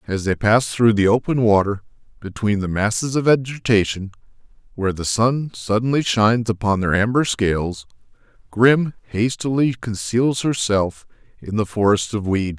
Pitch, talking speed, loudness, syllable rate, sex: 110 Hz, 145 wpm, -19 LUFS, 4.8 syllables/s, male